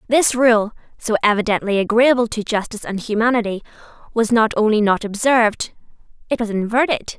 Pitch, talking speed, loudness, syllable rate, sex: 225 Hz, 140 wpm, -18 LUFS, 5.7 syllables/s, female